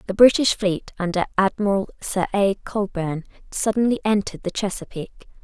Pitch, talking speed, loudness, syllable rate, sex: 200 Hz, 130 wpm, -22 LUFS, 5.5 syllables/s, female